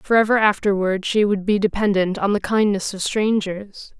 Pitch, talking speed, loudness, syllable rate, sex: 200 Hz, 165 wpm, -19 LUFS, 4.8 syllables/s, female